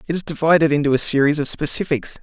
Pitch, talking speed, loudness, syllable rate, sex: 150 Hz, 215 wpm, -18 LUFS, 6.8 syllables/s, male